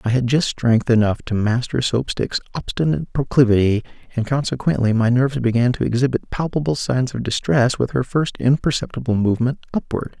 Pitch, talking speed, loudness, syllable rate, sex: 125 Hz, 165 wpm, -19 LUFS, 5.6 syllables/s, male